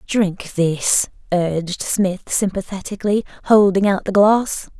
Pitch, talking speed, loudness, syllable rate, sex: 195 Hz, 125 wpm, -18 LUFS, 4.4 syllables/s, female